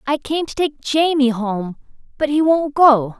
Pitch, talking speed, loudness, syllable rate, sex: 280 Hz, 190 wpm, -17 LUFS, 4.1 syllables/s, female